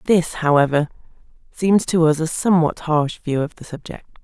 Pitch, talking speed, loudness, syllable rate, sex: 165 Hz, 170 wpm, -19 LUFS, 5.0 syllables/s, female